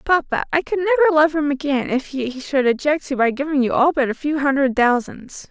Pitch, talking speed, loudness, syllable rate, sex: 280 Hz, 230 wpm, -19 LUFS, 5.7 syllables/s, female